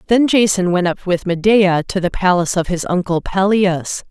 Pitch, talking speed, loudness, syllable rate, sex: 185 Hz, 190 wpm, -16 LUFS, 5.0 syllables/s, female